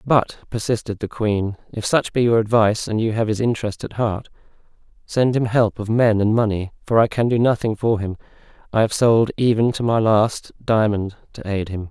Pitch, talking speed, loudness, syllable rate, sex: 110 Hz, 205 wpm, -20 LUFS, 5.2 syllables/s, male